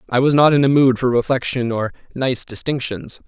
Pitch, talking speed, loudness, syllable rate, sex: 125 Hz, 200 wpm, -17 LUFS, 5.4 syllables/s, male